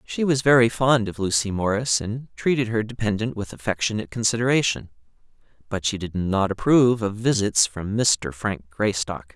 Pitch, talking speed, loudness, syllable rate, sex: 110 Hz, 155 wpm, -22 LUFS, 5.2 syllables/s, male